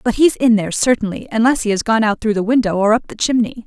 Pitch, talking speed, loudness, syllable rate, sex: 225 Hz, 280 wpm, -16 LUFS, 6.7 syllables/s, female